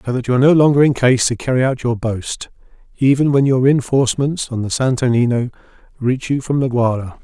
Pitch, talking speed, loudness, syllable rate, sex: 130 Hz, 215 wpm, -16 LUFS, 5.9 syllables/s, male